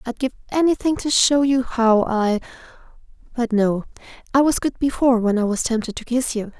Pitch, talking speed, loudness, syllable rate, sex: 245 Hz, 180 wpm, -20 LUFS, 5.4 syllables/s, female